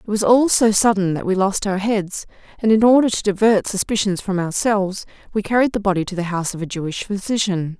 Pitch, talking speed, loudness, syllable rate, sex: 200 Hz, 225 wpm, -18 LUFS, 5.9 syllables/s, female